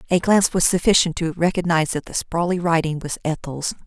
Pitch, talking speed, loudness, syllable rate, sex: 170 Hz, 185 wpm, -20 LUFS, 6.0 syllables/s, female